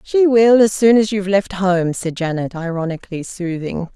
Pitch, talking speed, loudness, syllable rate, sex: 190 Hz, 180 wpm, -17 LUFS, 5.0 syllables/s, female